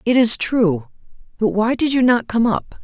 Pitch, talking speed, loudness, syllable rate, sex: 240 Hz, 210 wpm, -17 LUFS, 4.4 syllables/s, female